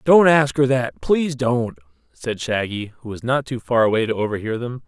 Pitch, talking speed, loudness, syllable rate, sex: 120 Hz, 210 wpm, -20 LUFS, 5.0 syllables/s, male